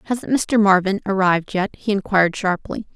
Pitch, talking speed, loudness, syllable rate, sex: 195 Hz, 165 wpm, -19 LUFS, 5.4 syllables/s, female